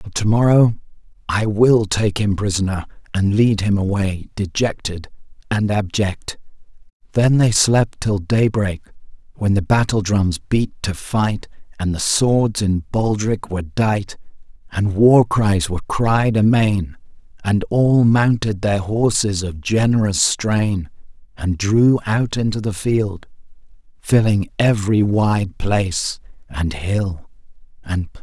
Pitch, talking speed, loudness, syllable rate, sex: 105 Hz, 130 wpm, -18 LUFS, 3.8 syllables/s, male